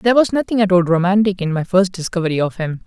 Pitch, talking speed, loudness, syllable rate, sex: 190 Hz, 250 wpm, -17 LUFS, 6.7 syllables/s, male